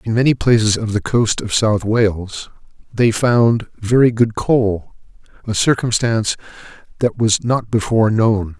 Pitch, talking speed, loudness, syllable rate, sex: 110 Hz, 145 wpm, -16 LUFS, 4.3 syllables/s, male